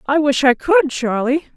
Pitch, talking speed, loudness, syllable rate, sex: 260 Hz, 190 wpm, -16 LUFS, 4.4 syllables/s, female